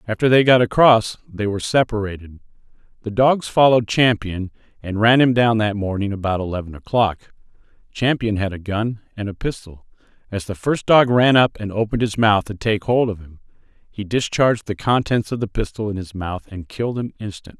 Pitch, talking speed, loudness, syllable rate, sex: 110 Hz, 190 wpm, -19 LUFS, 5.4 syllables/s, male